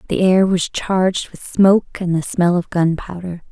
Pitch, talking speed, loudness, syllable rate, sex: 180 Hz, 190 wpm, -17 LUFS, 4.6 syllables/s, female